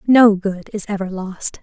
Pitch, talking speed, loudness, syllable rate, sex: 200 Hz, 185 wpm, -18 LUFS, 4.1 syllables/s, female